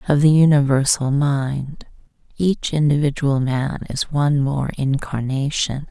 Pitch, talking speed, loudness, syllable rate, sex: 140 Hz, 110 wpm, -19 LUFS, 4.1 syllables/s, female